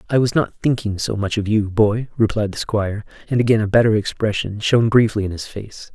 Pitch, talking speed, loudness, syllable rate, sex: 110 Hz, 220 wpm, -19 LUFS, 5.7 syllables/s, male